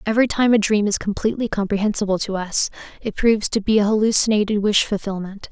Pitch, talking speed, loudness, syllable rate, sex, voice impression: 210 Hz, 185 wpm, -19 LUFS, 6.5 syllables/s, female, feminine, slightly young, slightly clear, slightly fluent, slightly cute, slightly refreshing, slightly calm, friendly